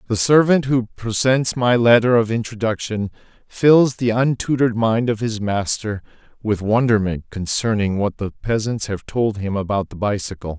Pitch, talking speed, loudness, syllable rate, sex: 110 Hz, 155 wpm, -19 LUFS, 4.8 syllables/s, male